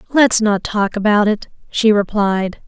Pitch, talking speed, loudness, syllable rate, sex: 210 Hz, 155 wpm, -16 LUFS, 4.0 syllables/s, female